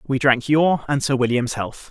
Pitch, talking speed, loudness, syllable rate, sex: 135 Hz, 220 wpm, -19 LUFS, 4.5 syllables/s, male